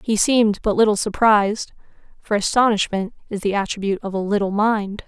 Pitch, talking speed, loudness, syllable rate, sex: 210 Hz, 165 wpm, -19 LUFS, 5.8 syllables/s, female